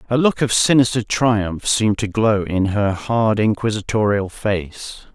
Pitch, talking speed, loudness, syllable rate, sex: 105 Hz, 150 wpm, -18 LUFS, 4.1 syllables/s, male